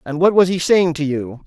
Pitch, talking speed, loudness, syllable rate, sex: 160 Hz, 285 wpm, -16 LUFS, 5.2 syllables/s, male